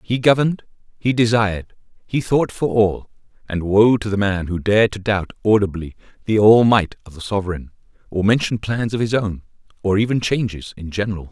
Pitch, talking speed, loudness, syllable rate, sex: 105 Hz, 185 wpm, -18 LUFS, 5.5 syllables/s, male